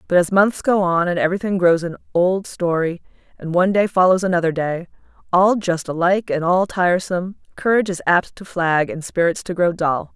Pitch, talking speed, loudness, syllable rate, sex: 180 Hz, 195 wpm, -18 LUFS, 5.6 syllables/s, female